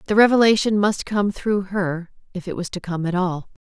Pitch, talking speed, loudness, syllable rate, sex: 195 Hz, 210 wpm, -20 LUFS, 5.1 syllables/s, female